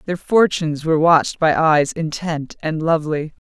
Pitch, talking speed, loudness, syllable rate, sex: 160 Hz, 155 wpm, -18 LUFS, 5.1 syllables/s, female